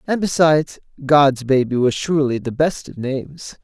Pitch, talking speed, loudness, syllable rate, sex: 140 Hz, 165 wpm, -18 LUFS, 5.0 syllables/s, male